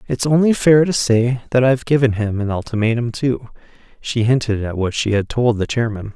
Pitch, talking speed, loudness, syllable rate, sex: 120 Hz, 205 wpm, -17 LUFS, 5.4 syllables/s, male